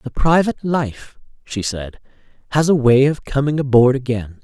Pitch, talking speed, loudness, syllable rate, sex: 130 Hz, 160 wpm, -17 LUFS, 4.9 syllables/s, male